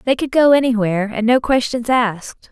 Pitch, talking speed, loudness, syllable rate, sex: 240 Hz, 190 wpm, -16 LUFS, 5.5 syllables/s, female